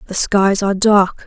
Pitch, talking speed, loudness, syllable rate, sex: 200 Hz, 190 wpm, -14 LUFS, 4.6 syllables/s, female